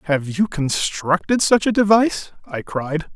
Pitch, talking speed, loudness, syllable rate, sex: 175 Hz, 150 wpm, -19 LUFS, 4.4 syllables/s, male